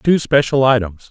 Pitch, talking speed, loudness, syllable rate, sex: 125 Hz, 160 wpm, -15 LUFS, 4.7 syllables/s, male